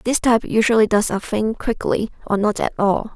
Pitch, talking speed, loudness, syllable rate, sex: 215 Hz, 210 wpm, -19 LUFS, 5.3 syllables/s, female